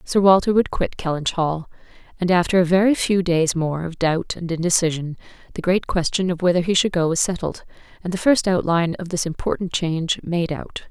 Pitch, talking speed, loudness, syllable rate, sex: 175 Hz, 205 wpm, -20 LUFS, 5.5 syllables/s, female